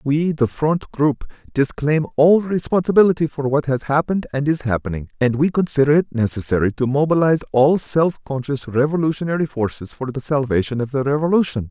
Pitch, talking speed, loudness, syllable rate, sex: 145 Hz, 165 wpm, -19 LUFS, 5.7 syllables/s, male